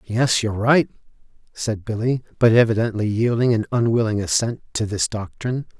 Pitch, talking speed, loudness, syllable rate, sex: 115 Hz, 145 wpm, -20 LUFS, 5.4 syllables/s, male